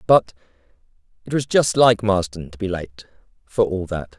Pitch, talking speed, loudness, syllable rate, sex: 100 Hz, 170 wpm, -20 LUFS, 4.7 syllables/s, male